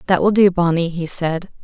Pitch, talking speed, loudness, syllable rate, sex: 175 Hz, 220 wpm, -17 LUFS, 5.2 syllables/s, female